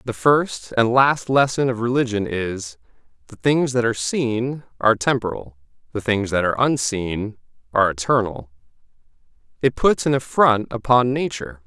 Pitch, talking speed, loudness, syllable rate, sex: 115 Hz, 145 wpm, -20 LUFS, 4.9 syllables/s, male